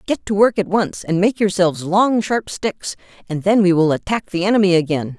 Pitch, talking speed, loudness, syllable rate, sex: 190 Hz, 220 wpm, -17 LUFS, 5.3 syllables/s, female